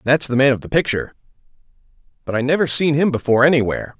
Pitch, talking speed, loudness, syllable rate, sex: 135 Hz, 195 wpm, -17 LUFS, 7.6 syllables/s, male